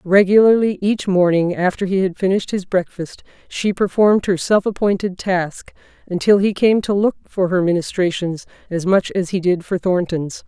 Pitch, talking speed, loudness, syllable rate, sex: 185 Hz, 170 wpm, -17 LUFS, 4.9 syllables/s, female